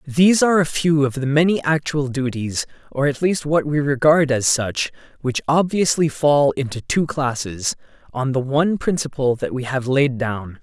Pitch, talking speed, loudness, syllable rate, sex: 140 Hz, 180 wpm, -19 LUFS, 4.7 syllables/s, male